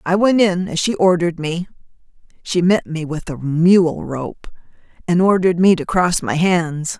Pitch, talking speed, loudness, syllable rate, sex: 175 Hz, 180 wpm, -17 LUFS, 4.5 syllables/s, female